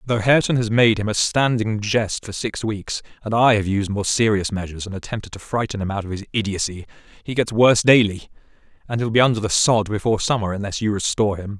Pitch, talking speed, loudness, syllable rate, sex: 105 Hz, 225 wpm, -20 LUFS, 6.2 syllables/s, male